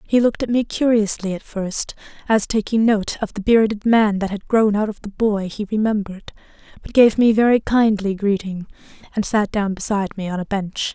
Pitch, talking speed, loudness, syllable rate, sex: 210 Hz, 205 wpm, -19 LUFS, 5.4 syllables/s, female